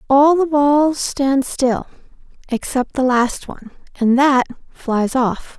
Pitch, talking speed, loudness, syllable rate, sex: 265 Hz, 140 wpm, -17 LUFS, 3.4 syllables/s, female